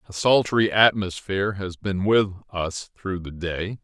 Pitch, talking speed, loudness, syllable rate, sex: 95 Hz, 155 wpm, -23 LUFS, 4.2 syllables/s, male